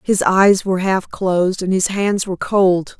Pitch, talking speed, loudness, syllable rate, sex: 190 Hz, 200 wpm, -16 LUFS, 4.5 syllables/s, female